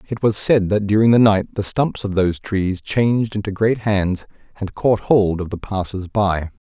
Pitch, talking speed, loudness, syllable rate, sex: 100 Hz, 205 wpm, -18 LUFS, 4.7 syllables/s, male